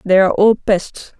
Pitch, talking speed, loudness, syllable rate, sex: 195 Hz, 200 wpm, -14 LUFS, 4.8 syllables/s, female